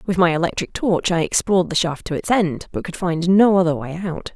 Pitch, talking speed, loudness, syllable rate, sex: 175 Hz, 250 wpm, -19 LUFS, 5.6 syllables/s, female